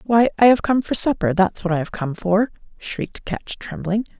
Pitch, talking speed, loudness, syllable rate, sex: 205 Hz, 215 wpm, -20 LUFS, 5.0 syllables/s, female